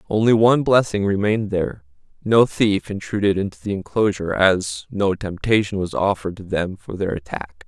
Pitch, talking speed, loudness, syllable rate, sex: 100 Hz, 155 wpm, -20 LUFS, 5.4 syllables/s, male